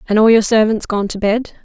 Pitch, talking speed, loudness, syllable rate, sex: 215 Hz, 255 wpm, -14 LUFS, 5.8 syllables/s, female